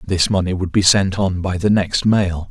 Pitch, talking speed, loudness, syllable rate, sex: 95 Hz, 240 wpm, -17 LUFS, 4.6 syllables/s, male